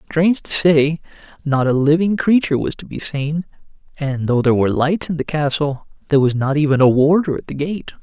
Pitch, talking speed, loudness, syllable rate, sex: 150 Hz, 210 wpm, -17 LUFS, 5.7 syllables/s, male